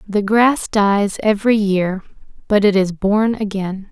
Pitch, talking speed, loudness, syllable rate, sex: 205 Hz, 155 wpm, -16 LUFS, 3.9 syllables/s, female